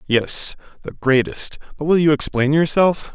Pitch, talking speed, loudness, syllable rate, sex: 150 Hz, 155 wpm, -18 LUFS, 4.4 syllables/s, male